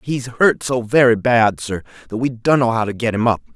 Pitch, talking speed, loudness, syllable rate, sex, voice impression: 120 Hz, 235 wpm, -17 LUFS, 5.2 syllables/s, male, masculine, adult-like, slightly fluent, refreshing, sincere